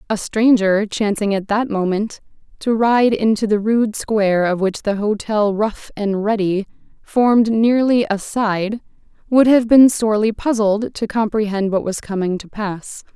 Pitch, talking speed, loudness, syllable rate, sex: 215 Hz, 160 wpm, -17 LUFS, 4.3 syllables/s, female